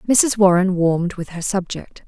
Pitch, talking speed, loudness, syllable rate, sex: 190 Hz, 175 wpm, -18 LUFS, 4.8 syllables/s, female